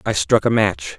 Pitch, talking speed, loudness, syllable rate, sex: 105 Hz, 245 wpm, -17 LUFS, 4.6 syllables/s, male